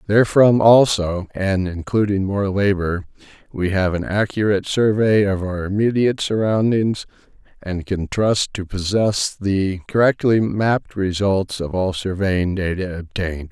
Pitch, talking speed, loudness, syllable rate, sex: 100 Hz, 130 wpm, -19 LUFS, 4.3 syllables/s, male